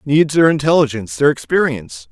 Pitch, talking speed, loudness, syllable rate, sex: 135 Hz, 140 wpm, -15 LUFS, 6.0 syllables/s, male